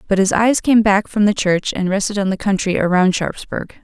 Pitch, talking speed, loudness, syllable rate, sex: 200 Hz, 235 wpm, -16 LUFS, 5.3 syllables/s, female